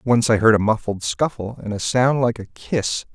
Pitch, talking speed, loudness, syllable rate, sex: 110 Hz, 230 wpm, -20 LUFS, 4.9 syllables/s, male